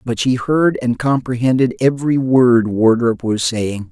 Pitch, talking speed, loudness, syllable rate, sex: 120 Hz, 155 wpm, -16 LUFS, 4.3 syllables/s, male